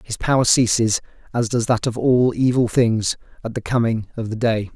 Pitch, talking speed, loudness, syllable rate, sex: 115 Hz, 200 wpm, -19 LUFS, 5.0 syllables/s, male